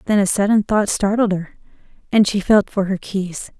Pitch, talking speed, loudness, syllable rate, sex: 200 Hz, 200 wpm, -18 LUFS, 5.1 syllables/s, female